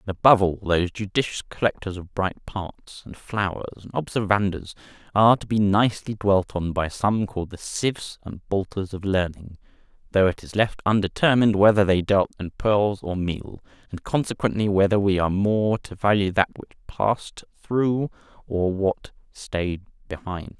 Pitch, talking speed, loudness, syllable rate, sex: 100 Hz, 165 wpm, -23 LUFS, 5.0 syllables/s, male